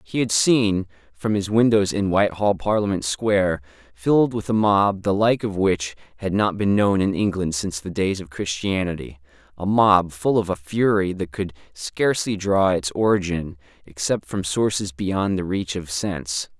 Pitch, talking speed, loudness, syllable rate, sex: 95 Hz, 175 wpm, -21 LUFS, 4.7 syllables/s, male